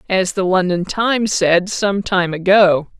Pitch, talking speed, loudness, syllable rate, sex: 190 Hz, 160 wpm, -16 LUFS, 4.0 syllables/s, female